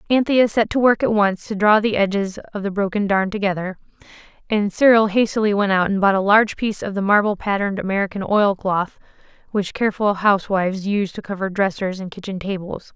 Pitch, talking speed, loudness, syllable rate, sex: 200 Hz, 200 wpm, -19 LUFS, 6.0 syllables/s, female